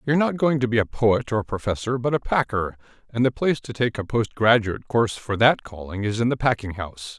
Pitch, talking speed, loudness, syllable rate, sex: 115 Hz, 240 wpm, -23 LUFS, 6.1 syllables/s, male